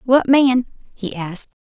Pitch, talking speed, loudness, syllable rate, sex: 240 Hz, 145 wpm, -17 LUFS, 4.1 syllables/s, female